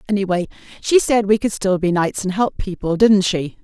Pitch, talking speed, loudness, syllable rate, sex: 200 Hz, 215 wpm, -18 LUFS, 5.1 syllables/s, female